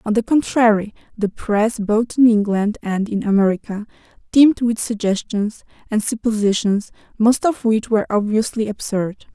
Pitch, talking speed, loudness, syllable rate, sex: 220 Hz, 140 wpm, -18 LUFS, 4.8 syllables/s, female